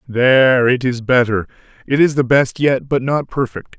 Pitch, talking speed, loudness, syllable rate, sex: 130 Hz, 160 wpm, -15 LUFS, 4.6 syllables/s, male